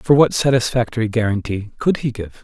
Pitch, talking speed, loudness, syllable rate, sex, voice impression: 115 Hz, 175 wpm, -18 LUFS, 5.5 syllables/s, male, very masculine, adult-like, cool, slightly calm, slightly sweet